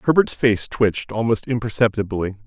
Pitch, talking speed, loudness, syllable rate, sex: 110 Hz, 120 wpm, -20 LUFS, 5.6 syllables/s, male